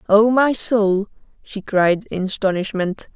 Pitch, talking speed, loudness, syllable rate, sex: 205 Hz, 135 wpm, -18 LUFS, 3.9 syllables/s, female